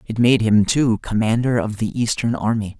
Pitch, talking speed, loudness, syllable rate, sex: 115 Hz, 195 wpm, -19 LUFS, 4.9 syllables/s, male